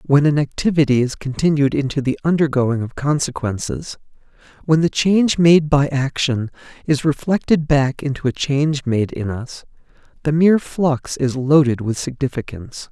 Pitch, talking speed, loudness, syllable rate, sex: 140 Hz, 150 wpm, -18 LUFS, 5.0 syllables/s, male